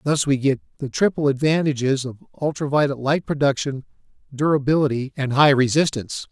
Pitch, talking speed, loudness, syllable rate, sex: 140 Hz, 145 wpm, -20 LUFS, 5.6 syllables/s, male